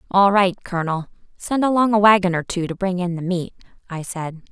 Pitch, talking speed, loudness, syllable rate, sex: 185 Hz, 210 wpm, -19 LUFS, 5.8 syllables/s, female